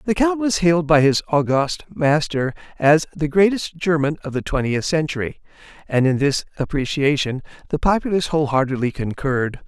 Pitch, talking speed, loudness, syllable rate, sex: 155 Hz, 150 wpm, -20 LUFS, 5.4 syllables/s, male